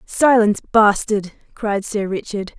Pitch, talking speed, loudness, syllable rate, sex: 210 Hz, 115 wpm, -18 LUFS, 4.3 syllables/s, female